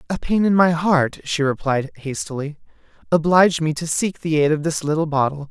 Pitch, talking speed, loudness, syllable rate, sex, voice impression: 155 Hz, 195 wpm, -19 LUFS, 5.3 syllables/s, male, masculine, adult-like, tensed, powerful, bright, slightly muffled, intellectual, slightly refreshing, calm, friendly, slightly reassuring, lively, kind, slightly modest